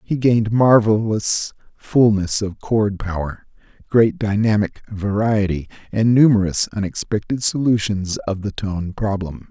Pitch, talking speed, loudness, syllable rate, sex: 105 Hz, 115 wpm, -19 LUFS, 4.2 syllables/s, male